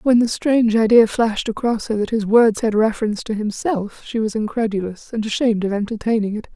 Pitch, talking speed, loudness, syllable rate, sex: 220 Hz, 200 wpm, -19 LUFS, 6.0 syllables/s, female